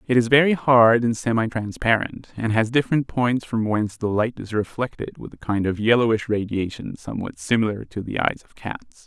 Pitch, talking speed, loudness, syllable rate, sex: 115 Hz, 200 wpm, -22 LUFS, 5.4 syllables/s, male